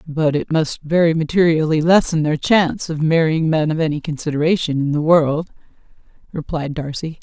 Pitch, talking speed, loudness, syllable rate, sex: 155 Hz, 160 wpm, -17 LUFS, 5.2 syllables/s, female